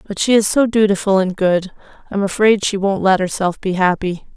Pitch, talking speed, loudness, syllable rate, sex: 195 Hz, 205 wpm, -16 LUFS, 5.3 syllables/s, female